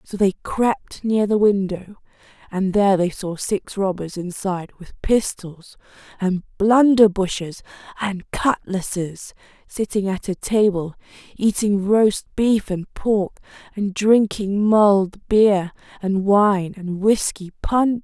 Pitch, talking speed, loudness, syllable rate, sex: 200 Hz, 125 wpm, -20 LUFS, 3.7 syllables/s, female